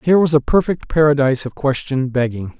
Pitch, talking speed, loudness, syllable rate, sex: 140 Hz, 185 wpm, -17 LUFS, 6.0 syllables/s, male